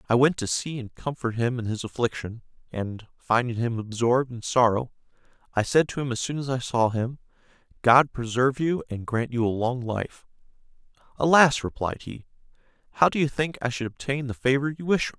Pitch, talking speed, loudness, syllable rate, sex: 125 Hz, 200 wpm, -25 LUFS, 5.4 syllables/s, male